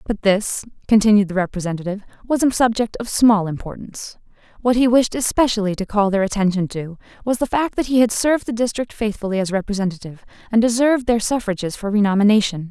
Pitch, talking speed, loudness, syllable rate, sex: 215 Hz, 180 wpm, -19 LUFS, 6.3 syllables/s, female